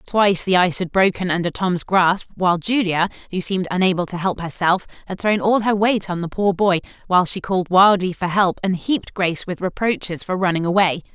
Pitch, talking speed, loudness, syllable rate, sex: 185 Hz, 210 wpm, -19 LUFS, 5.8 syllables/s, female